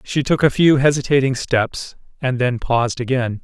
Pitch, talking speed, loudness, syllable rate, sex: 130 Hz, 175 wpm, -18 LUFS, 4.8 syllables/s, male